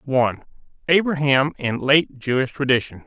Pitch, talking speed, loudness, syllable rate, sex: 135 Hz, 115 wpm, -20 LUFS, 5.4 syllables/s, male